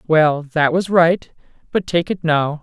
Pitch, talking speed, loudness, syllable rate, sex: 165 Hz, 185 wpm, -17 LUFS, 3.8 syllables/s, female